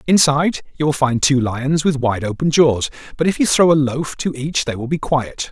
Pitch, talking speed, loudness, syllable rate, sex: 140 Hz, 240 wpm, -17 LUFS, 5.1 syllables/s, male